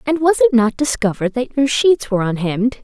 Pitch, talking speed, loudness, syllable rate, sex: 240 Hz, 210 wpm, -16 LUFS, 6.0 syllables/s, female